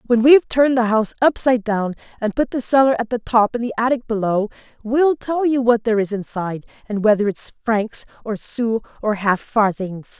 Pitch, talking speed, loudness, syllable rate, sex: 230 Hz, 200 wpm, -19 LUFS, 5.6 syllables/s, female